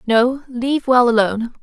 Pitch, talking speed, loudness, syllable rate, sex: 245 Hz, 150 wpm, -17 LUFS, 5.0 syllables/s, female